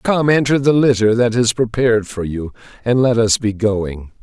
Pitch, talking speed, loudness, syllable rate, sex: 115 Hz, 200 wpm, -16 LUFS, 4.7 syllables/s, male